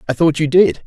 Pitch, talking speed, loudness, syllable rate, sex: 150 Hz, 275 wpm, -14 LUFS, 5.8 syllables/s, male